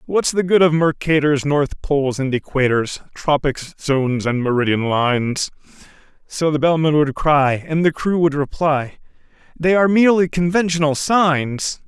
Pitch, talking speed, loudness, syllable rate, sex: 150 Hz, 145 wpm, -18 LUFS, 4.6 syllables/s, male